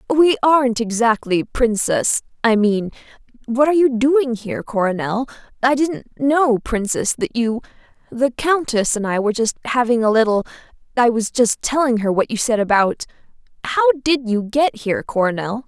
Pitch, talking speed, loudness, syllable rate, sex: 240 Hz, 140 wpm, -18 LUFS, 5.1 syllables/s, female